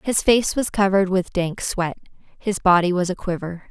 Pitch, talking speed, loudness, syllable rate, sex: 190 Hz, 180 wpm, -20 LUFS, 5.0 syllables/s, female